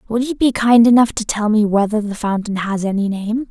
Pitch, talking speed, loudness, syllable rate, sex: 220 Hz, 240 wpm, -16 LUFS, 5.4 syllables/s, female